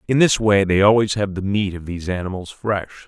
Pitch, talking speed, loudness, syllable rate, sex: 100 Hz, 235 wpm, -19 LUFS, 5.5 syllables/s, male